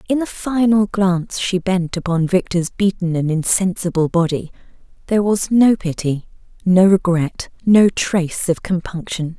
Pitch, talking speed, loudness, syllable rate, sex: 185 Hz, 140 wpm, -17 LUFS, 4.6 syllables/s, female